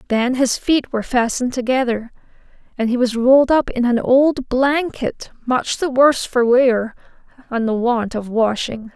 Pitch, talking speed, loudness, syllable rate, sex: 250 Hz, 170 wpm, -17 LUFS, 4.6 syllables/s, female